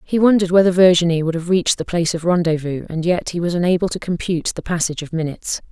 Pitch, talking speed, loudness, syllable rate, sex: 170 Hz, 230 wpm, -18 LUFS, 7.1 syllables/s, female